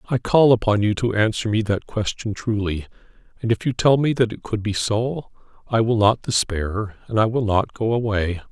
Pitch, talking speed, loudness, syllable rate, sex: 110 Hz, 210 wpm, -21 LUFS, 4.9 syllables/s, male